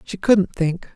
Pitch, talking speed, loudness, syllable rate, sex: 185 Hz, 190 wpm, -19 LUFS, 3.5 syllables/s, female